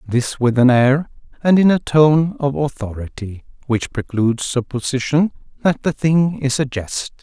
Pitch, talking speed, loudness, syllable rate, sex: 135 Hz, 160 wpm, -17 LUFS, 4.4 syllables/s, male